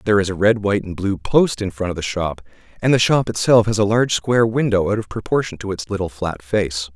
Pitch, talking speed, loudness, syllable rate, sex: 100 Hz, 260 wpm, -19 LUFS, 6.1 syllables/s, male